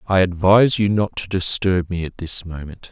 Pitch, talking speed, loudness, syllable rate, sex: 95 Hz, 205 wpm, -19 LUFS, 5.1 syllables/s, male